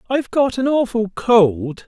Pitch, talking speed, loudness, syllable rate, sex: 225 Hz, 160 wpm, -17 LUFS, 4.2 syllables/s, male